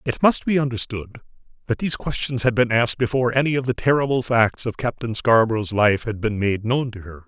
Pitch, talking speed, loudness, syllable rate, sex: 120 Hz, 215 wpm, -21 LUFS, 5.9 syllables/s, male